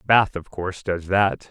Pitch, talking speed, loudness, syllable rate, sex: 95 Hz, 200 wpm, -22 LUFS, 4.3 syllables/s, male